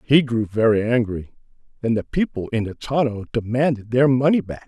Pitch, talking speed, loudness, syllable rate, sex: 120 Hz, 180 wpm, -21 LUFS, 5.3 syllables/s, male